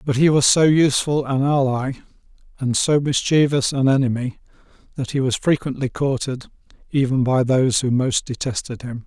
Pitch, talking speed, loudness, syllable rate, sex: 135 Hz, 160 wpm, -19 LUFS, 5.1 syllables/s, male